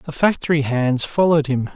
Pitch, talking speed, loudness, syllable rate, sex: 145 Hz, 170 wpm, -18 LUFS, 5.3 syllables/s, male